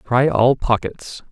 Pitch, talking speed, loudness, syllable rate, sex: 125 Hz, 135 wpm, -17 LUFS, 3.6 syllables/s, male